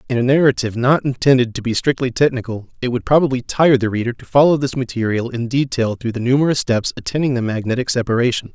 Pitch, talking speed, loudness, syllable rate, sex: 125 Hz, 205 wpm, -17 LUFS, 6.5 syllables/s, male